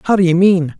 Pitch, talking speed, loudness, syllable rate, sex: 175 Hz, 305 wpm, -12 LUFS, 6.5 syllables/s, male